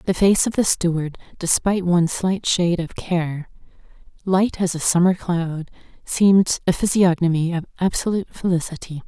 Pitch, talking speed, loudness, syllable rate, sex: 175 Hz, 145 wpm, -20 LUFS, 5.0 syllables/s, female